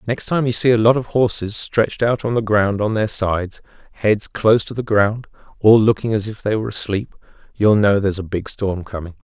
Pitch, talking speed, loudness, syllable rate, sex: 105 Hz, 225 wpm, -18 LUFS, 5.5 syllables/s, male